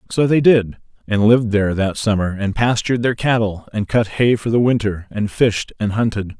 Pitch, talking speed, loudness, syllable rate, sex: 110 Hz, 205 wpm, -17 LUFS, 5.2 syllables/s, male